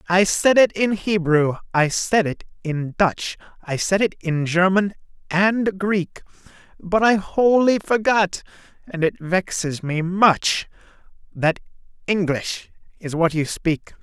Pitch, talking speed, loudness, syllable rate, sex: 185 Hz, 135 wpm, -20 LUFS, 3.4 syllables/s, male